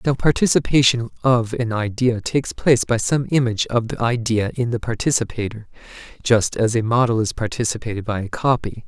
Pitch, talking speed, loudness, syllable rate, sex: 120 Hz, 170 wpm, -20 LUFS, 5.6 syllables/s, male